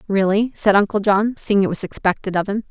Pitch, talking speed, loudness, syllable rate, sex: 200 Hz, 220 wpm, -18 LUFS, 5.7 syllables/s, female